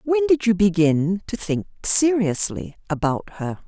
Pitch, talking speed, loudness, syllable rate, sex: 200 Hz, 145 wpm, -20 LUFS, 4.0 syllables/s, female